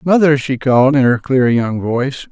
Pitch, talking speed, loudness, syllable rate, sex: 135 Hz, 210 wpm, -14 LUFS, 5.0 syllables/s, male